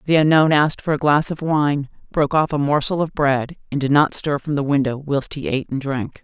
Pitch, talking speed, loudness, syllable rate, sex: 145 Hz, 250 wpm, -19 LUFS, 5.6 syllables/s, female